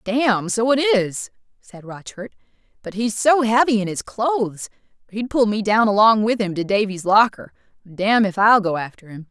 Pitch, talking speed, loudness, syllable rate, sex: 215 Hz, 180 wpm, -18 LUFS, 4.9 syllables/s, female